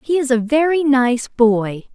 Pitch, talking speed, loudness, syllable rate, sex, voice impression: 260 Hz, 185 wpm, -16 LUFS, 4.1 syllables/s, female, very feminine, young, very thin, tensed, slightly powerful, bright, soft, very clear, fluent, very cute, slightly intellectual, refreshing, sincere, very calm, friendly, reassuring, slightly unique, elegant, slightly wild, sweet, kind, slightly modest, slightly light